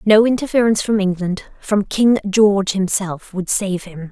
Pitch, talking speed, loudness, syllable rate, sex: 200 Hz, 130 wpm, -17 LUFS, 4.7 syllables/s, female